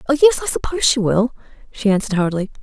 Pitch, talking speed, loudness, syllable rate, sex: 200 Hz, 205 wpm, -18 LUFS, 7.8 syllables/s, female